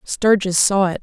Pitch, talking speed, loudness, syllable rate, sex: 195 Hz, 175 wpm, -16 LUFS, 4.3 syllables/s, female